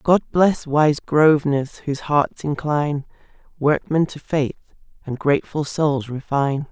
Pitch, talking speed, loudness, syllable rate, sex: 145 Hz, 125 wpm, -20 LUFS, 4.7 syllables/s, female